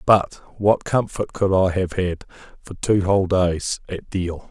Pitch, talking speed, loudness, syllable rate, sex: 95 Hz, 175 wpm, -21 LUFS, 4.4 syllables/s, male